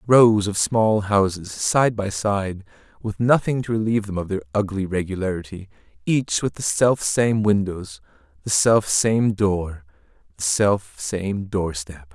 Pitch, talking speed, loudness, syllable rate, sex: 100 Hz, 155 wpm, -21 LUFS, 4.0 syllables/s, male